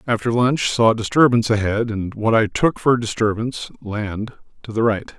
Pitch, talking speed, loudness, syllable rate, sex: 115 Hz, 175 wpm, -19 LUFS, 5.5 syllables/s, male